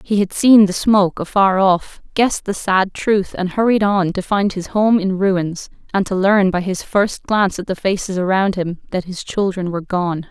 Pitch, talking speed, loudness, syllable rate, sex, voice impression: 190 Hz, 215 wpm, -17 LUFS, 4.7 syllables/s, female, very feminine, young, slightly adult-like, very thin, tensed, slightly weak, bright, slightly soft, clear, fluent, slightly raspy, cute, very intellectual, refreshing, slightly sincere, slightly calm, friendly, unique, elegant, slightly wild, sweet, kind, slightly modest